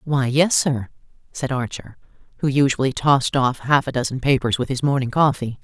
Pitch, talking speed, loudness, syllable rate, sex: 135 Hz, 180 wpm, -20 LUFS, 5.3 syllables/s, female